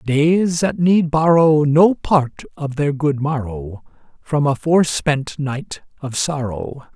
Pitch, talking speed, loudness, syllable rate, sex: 145 Hz, 145 wpm, -17 LUFS, 3.3 syllables/s, male